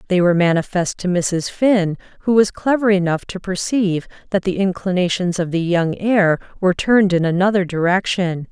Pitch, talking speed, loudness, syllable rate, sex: 185 Hz, 170 wpm, -18 LUFS, 5.3 syllables/s, female